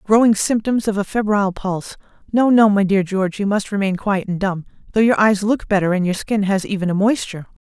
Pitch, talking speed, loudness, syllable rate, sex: 200 Hz, 220 wpm, -18 LUFS, 5.9 syllables/s, female